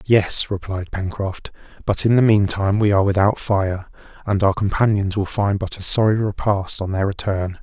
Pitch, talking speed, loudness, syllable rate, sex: 100 Hz, 180 wpm, -19 LUFS, 5.0 syllables/s, male